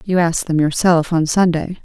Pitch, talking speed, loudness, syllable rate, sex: 165 Hz, 195 wpm, -16 LUFS, 5.3 syllables/s, female